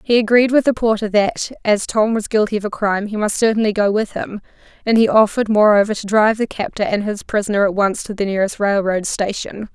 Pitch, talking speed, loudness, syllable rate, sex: 210 Hz, 230 wpm, -17 LUFS, 6.0 syllables/s, female